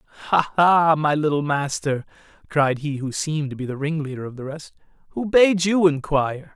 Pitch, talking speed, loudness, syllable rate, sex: 150 Hz, 185 wpm, -21 LUFS, 5.4 syllables/s, male